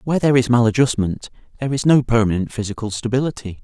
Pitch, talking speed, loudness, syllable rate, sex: 120 Hz, 165 wpm, -18 LUFS, 7.1 syllables/s, male